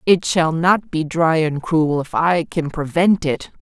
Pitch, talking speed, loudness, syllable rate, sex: 165 Hz, 200 wpm, -18 LUFS, 3.9 syllables/s, female